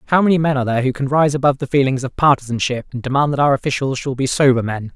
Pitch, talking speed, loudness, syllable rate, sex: 135 Hz, 265 wpm, -17 LUFS, 7.5 syllables/s, male